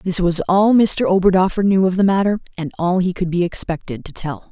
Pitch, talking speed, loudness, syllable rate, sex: 180 Hz, 225 wpm, -17 LUFS, 5.5 syllables/s, female